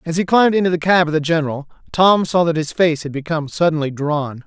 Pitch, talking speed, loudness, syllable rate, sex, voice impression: 160 Hz, 240 wpm, -17 LUFS, 6.3 syllables/s, male, masculine, adult-like, clear, slightly refreshing, slightly sincere, slightly unique